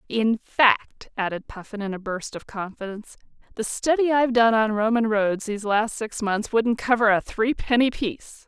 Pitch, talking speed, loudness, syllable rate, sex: 220 Hz, 175 wpm, -23 LUFS, 4.9 syllables/s, female